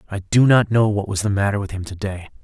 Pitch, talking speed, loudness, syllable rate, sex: 100 Hz, 295 wpm, -19 LUFS, 6.2 syllables/s, male